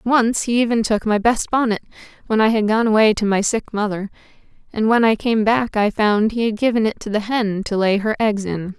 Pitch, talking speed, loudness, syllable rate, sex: 220 Hz, 240 wpm, -18 LUFS, 5.3 syllables/s, female